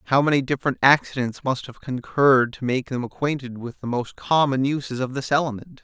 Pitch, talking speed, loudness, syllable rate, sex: 130 Hz, 195 wpm, -22 LUFS, 5.7 syllables/s, male